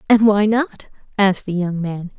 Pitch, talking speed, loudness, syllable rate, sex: 200 Hz, 190 wpm, -18 LUFS, 4.7 syllables/s, female